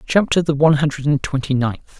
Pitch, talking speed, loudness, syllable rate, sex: 145 Hz, 210 wpm, -18 LUFS, 6.0 syllables/s, male